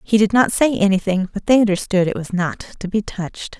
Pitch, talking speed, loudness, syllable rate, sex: 200 Hz, 235 wpm, -18 LUFS, 5.7 syllables/s, female